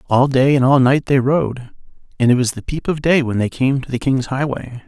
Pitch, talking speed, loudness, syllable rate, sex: 130 Hz, 260 wpm, -17 LUFS, 5.2 syllables/s, male